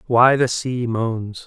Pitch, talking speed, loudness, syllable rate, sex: 120 Hz, 165 wpm, -19 LUFS, 3.1 syllables/s, male